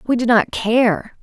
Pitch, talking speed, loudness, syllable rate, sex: 225 Hz, 195 wpm, -16 LUFS, 3.6 syllables/s, female